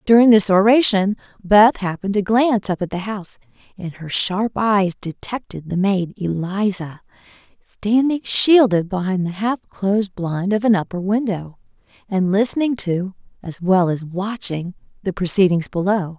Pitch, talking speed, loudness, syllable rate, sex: 195 Hz, 150 wpm, -18 LUFS, 4.6 syllables/s, female